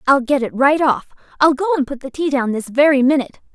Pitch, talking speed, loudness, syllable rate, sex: 275 Hz, 235 wpm, -16 LUFS, 6.3 syllables/s, female